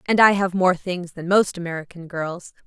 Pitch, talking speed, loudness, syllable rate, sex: 180 Hz, 205 wpm, -21 LUFS, 4.9 syllables/s, female